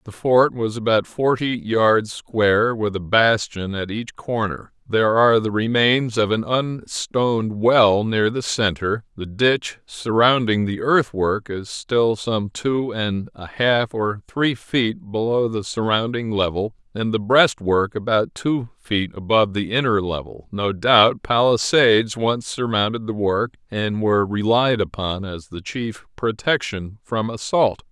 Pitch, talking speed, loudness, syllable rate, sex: 110 Hz, 150 wpm, -20 LUFS, 4.0 syllables/s, male